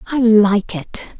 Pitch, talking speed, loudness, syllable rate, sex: 215 Hz, 150 wpm, -15 LUFS, 3.2 syllables/s, female